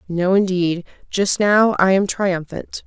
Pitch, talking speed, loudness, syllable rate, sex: 190 Hz, 145 wpm, -18 LUFS, 3.7 syllables/s, female